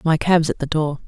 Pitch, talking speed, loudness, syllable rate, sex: 155 Hz, 280 wpm, -19 LUFS, 5.4 syllables/s, female